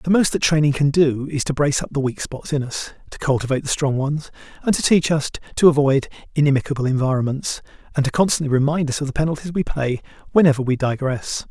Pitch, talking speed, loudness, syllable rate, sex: 145 Hz, 210 wpm, -20 LUFS, 6.3 syllables/s, male